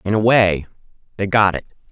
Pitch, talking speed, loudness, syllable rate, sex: 100 Hz, 190 wpm, -17 LUFS, 5.6 syllables/s, male